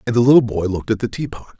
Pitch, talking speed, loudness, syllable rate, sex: 110 Hz, 340 wpm, -17 LUFS, 7.6 syllables/s, male